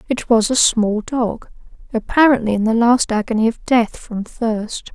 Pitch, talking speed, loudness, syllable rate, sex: 230 Hz, 170 wpm, -17 LUFS, 4.4 syllables/s, female